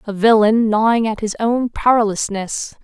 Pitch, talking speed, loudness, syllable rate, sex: 220 Hz, 150 wpm, -16 LUFS, 4.6 syllables/s, female